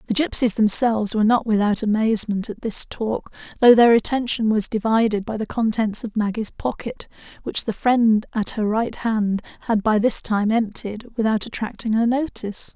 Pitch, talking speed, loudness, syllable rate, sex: 220 Hz, 175 wpm, -20 LUFS, 5.0 syllables/s, female